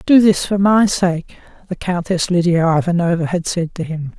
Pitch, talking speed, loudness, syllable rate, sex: 175 Hz, 185 wpm, -16 LUFS, 4.8 syllables/s, female